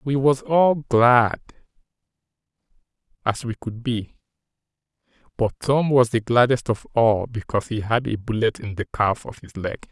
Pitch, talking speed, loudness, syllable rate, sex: 115 Hz, 155 wpm, -21 LUFS, 4.5 syllables/s, male